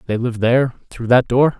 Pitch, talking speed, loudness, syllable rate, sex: 120 Hz, 225 wpm, -17 LUFS, 5.5 syllables/s, male